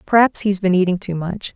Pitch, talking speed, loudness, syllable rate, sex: 195 Hz, 230 wpm, -18 LUFS, 5.3 syllables/s, female